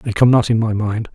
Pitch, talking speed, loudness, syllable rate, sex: 110 Hz, 315 wpm, -16 LUFS, 5.5 syllables/s, male